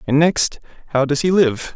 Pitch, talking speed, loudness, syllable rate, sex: 150 Hz, 205 wpm, -17 LUFS, 4.6 syllables/s, male